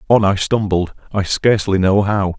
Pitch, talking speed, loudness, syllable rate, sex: 100 Hz, 175 wpm, -16 LUFS, 5.0 syllables/s, male